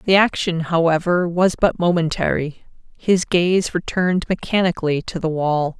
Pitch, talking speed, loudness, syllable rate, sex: 170 Hz, 135 wpm, -19 LUFS, 4.7 syllables/s, female